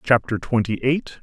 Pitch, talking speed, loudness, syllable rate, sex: 120 Hz, 145 wpm, -21 LUFS, 4.5 syllables/s, male